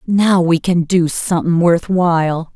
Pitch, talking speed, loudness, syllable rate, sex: 170 Hz, 140 wpm, -15 LUFS, 4.1 syllables/s, female